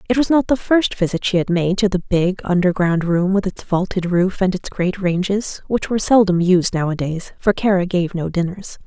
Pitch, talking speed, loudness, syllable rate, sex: 185 Hz, 210 wpm, -18 LUFS, 5.1 syllables/s, female